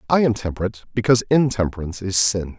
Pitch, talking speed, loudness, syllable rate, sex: 105 Hz, 160 wpm, -20 LUFS, 7.1 syllables/s, male